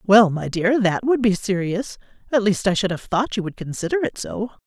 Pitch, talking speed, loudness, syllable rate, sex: 205 Hz, 230 wpm, -21 LUFS, 5.1 syllables/s, female